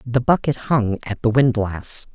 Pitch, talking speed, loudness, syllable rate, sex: 120 Hz, 170 wpm, -19 LUFS, 4.2 syllables/s, male